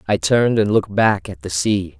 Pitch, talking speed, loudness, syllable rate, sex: 100 Hz, 240 wpm, -18 LUFS, 5.5 syllables/s, male